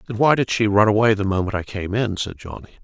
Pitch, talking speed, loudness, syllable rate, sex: 105 Hz, 275 wpm, -19 LUFS, 6.7 syllables/s, male